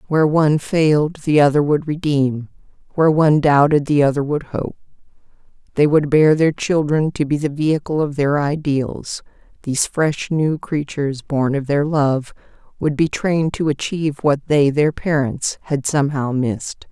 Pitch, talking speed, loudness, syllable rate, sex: 145 Hz, 160 wpm, -18 LUFS, 4.8 syllables/s, female